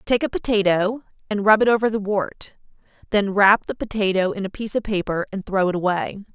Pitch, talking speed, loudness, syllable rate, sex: 200 Hz, 210 wpm, -21 LUFS, 5.8 syllables/s, female